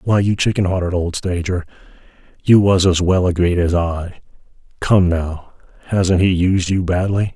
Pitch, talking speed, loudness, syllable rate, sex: 90 Hz, 165 wpm, -17 LUFS, 4.6 syllables/s, male